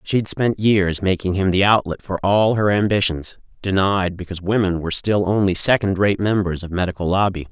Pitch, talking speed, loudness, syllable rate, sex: 95 Hz, 185 wpm, -19 LUFS, 5.3 syllables/s, male